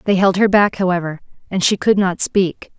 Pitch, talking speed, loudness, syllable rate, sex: 185 Hz, 215 wpm, -16 LUFS, 5.1 syllables/s, female